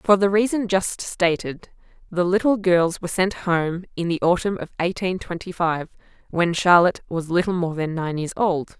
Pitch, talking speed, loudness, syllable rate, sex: 180 Hz, 185 wpm, -21 LUFS, 4.8 syllables/s, female